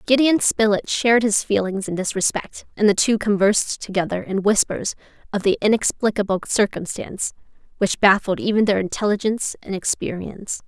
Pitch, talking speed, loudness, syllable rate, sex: 205 Hz, 145 wpm, -20 LUFS, 5.5 syllables/s, female